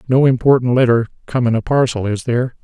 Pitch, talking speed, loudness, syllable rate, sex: 120 Hz, 205 wpm, -16 LUFS, 6.3 syllables/s, male